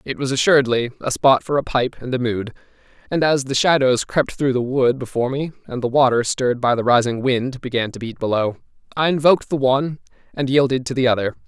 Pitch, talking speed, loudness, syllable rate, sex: 130 Hz, 220 wpm, -19 LUFS, 6.0 syllables/s, male